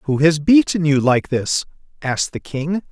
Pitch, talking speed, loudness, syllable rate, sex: 155 Hz, 185 wpm, -18 LUFS, 4.5 syllables/s, male